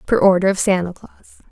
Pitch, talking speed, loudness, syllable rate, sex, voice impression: 185 Hz, 200 wpm, -16 LUFS, 7.0 syllables/s, female, feminine, adult-like, slightly relaxed, slightly weak, soft, slightly raspy, intellectual, calm, friendly, reassuring, elegant, kind, modest